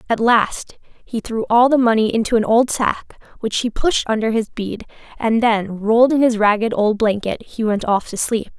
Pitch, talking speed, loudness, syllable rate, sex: 225 Hz, 210 wpm, -18 LUFS, 4.7 syllables/s, female